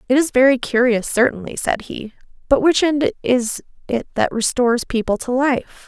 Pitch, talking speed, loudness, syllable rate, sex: 250 Hz, 175 wpm, -18 LUFS, 4.9 syllables/s, female